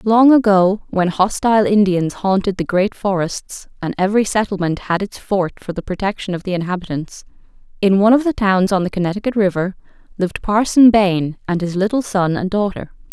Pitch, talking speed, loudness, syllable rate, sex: 195 Hz, 170 wpm, -17 LUFS, 5.5 syllables/s, female